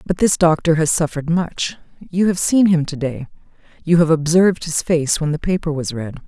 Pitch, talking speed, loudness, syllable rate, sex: 165 Hz, 210 wpm, -17 LUFS, 5.3 syllables/s, female